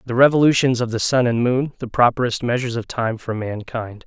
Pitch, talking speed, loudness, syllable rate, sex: 120 Hz, 205 wpm, -19 LUFS, 5.6 syllables/s, male